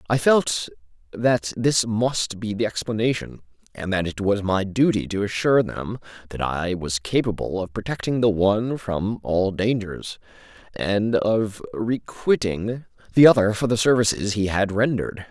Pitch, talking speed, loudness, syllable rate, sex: 105 Hz, 155 wpm, -22 LUFS, 4.5 syllables/s, male